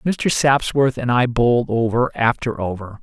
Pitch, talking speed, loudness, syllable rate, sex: 125 Hz, 160 wpm, -18 LUFS, 4.4 syllables/s, male